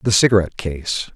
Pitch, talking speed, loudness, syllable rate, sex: 95 Hz, 155 wpm, -18 LUFS, 6.3 syllables/s, male